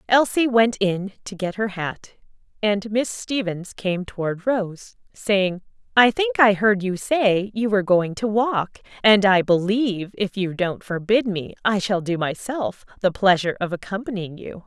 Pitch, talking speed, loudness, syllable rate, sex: 200 Hz, 170 wpm, -21 LUFS, 4.3 syllables/s, female